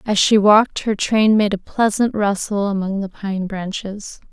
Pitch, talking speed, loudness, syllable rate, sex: 205 Hz, 180 wpm, -18 LUFS, 4.4 syllables/s, female